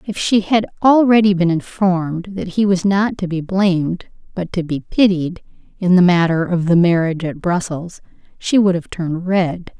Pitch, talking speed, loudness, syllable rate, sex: 180 Hz, 185 wpm, -16 LUFS, 4.8 syllables/s, female